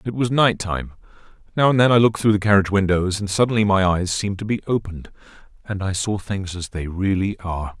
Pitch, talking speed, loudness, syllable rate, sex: 100 Hz, 215 wpm, -20 LUFS, 6.2 syllables/s, male